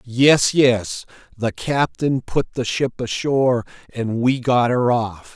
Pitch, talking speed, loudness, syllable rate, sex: 125 Hz, 145 wpm, -19 LUFS, 3.5 syllables/s, male